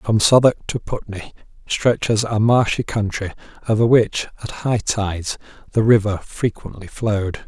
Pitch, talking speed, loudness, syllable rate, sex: 110 Hz, 135 wpm, -19 LUFS, 4.6 syllables/s, male